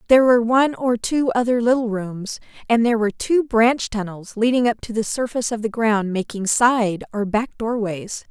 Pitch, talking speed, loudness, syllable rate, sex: 225 Hz, 195 wpm, -20 LUFS, 5.2 syllables/s, female